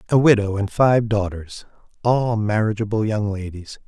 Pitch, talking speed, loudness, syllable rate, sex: 105 Hz, 140 wpm, -20 LUFS, 4.6 syllables/s, male